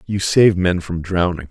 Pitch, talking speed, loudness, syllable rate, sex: 90 Hz, 200 wpm, -17 LUFS, 5.0 syllables/s, male